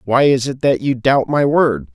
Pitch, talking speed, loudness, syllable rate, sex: 130 Hz, 245 wpm, -15 LUFS, 4.6 syllables/s, male